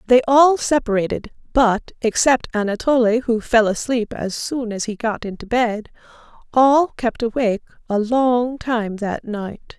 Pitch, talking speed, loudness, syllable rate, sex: 230 Hz, 145 wpm, -19 LUFS, 4.2 syllables/s, female